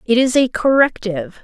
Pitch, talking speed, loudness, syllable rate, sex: 235 Hz, 165 wpm, -16 LUFS, 5.5 syllables/s, female